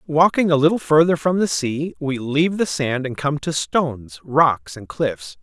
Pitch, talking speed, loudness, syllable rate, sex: 150 Hz, 200 wpm, -19 LUFS, 4.4 syllables/s, male